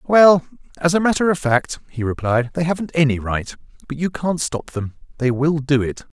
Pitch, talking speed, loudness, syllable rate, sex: 150 Hz, 195 wpm, -19 LUFS, 5.0 syllables/s, male